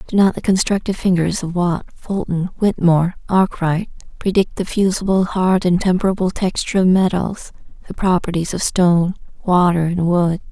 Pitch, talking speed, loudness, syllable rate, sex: 180 Hz, 150 wpm, -17 LUFS, 5.2 syllables/s, female